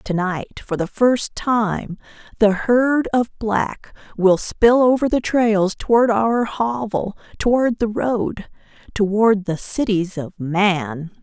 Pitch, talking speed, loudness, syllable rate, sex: 215 Hz, 135 wpm, -19 LUFS, 3.3 syllables/s, female